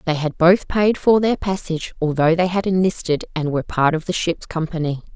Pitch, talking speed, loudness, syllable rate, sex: 170 Hz, 210 wpm, -19 LUFS, 5.6 syllables/s, female